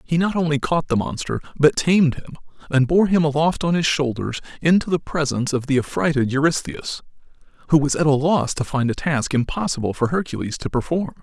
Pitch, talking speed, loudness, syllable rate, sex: 150 Hz, 200 wpm, -20 LUFS, 5.8 syllables/s, male